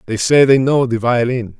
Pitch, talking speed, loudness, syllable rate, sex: 125 Hz, 225 wpm, -14 LUFS, 4.9 syllables/s, male